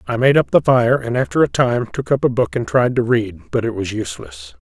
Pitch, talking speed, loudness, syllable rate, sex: 125 Hz, 270 wpm, -17 LUFS, 5.6 syllables/s, male